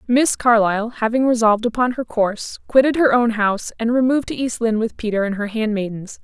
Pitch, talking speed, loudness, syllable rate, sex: 230 Hz, 200 wpm, -18 LUFS, 6.1 syllables/s, female